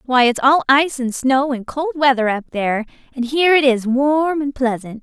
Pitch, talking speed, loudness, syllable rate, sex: 265 Hz, 225 wpm, -17 LUFS, 5.4 syllables/s, female